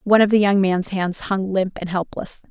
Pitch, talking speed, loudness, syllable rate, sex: 190 Hz, 240 wpm, -20 LUFS, 5.1 syllables/s, female